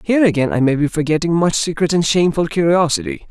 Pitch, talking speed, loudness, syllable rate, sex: 160 Hz, 200 wpm, -16 LUFS, 6.6 syllables/s, male